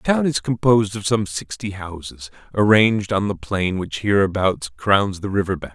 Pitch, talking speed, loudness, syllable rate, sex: 100 Hz, 190 wpm, -20 LUFS, 5.0 syllables/s, male